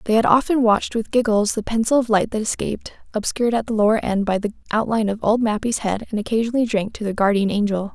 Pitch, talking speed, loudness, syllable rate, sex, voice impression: 220 Hz, 235 wpm, -20 LUFS, 6.7 syllables/s, female, very feminine, slightly young, slightly adult-like, very thin, relaxed, weak, slightly bright, soft, slightly muffled, fluent, raspy, very cute, intellectual, slightly refreshing, sincere, very calm, very friendly, very reassuring, very unique, elegant, wild, very sweet, slightly lively, very kind, slightly intense, modest